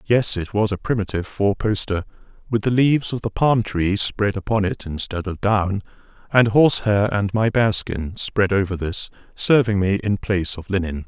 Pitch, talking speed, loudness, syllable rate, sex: 100 Hz, 185 wpm, -20 LUFS, 5.0 syllables/s, male